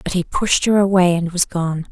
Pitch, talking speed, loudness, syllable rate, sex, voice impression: 180 Hz, 250 wpm, -17 LUFS, 5.0 syllables/s, female, very feminine, slightly young, slightly adult-like, very thin, relaxed, weak, dark, very soft, slightly muffled, fluent, very cute, very intellectual, slightly refreshing, sincere, very calm, very friendly, very reassuring, very unique, very elegant, slightly wild, very sweet, very kind, very modest, very light